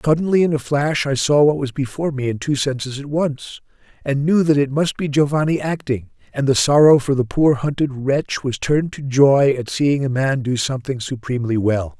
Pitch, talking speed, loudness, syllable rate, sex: 135 Hz, 215 wpm, -18 LUFS, 5.3 syllables/s, male